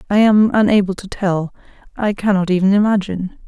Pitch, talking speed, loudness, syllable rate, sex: 200 Hz, 155 wpm, -16 LUFS, 5.8 syllables/s, female